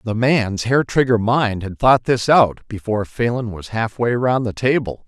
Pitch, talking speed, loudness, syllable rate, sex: 115 Hz, 200 wpm, -18 LUFS, 4.5 syllables/s, male